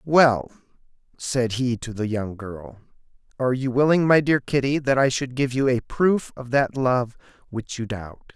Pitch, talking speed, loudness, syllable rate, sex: 125 Hz, 185 wpm, -22 LUFS, 4.5 syllables/s, male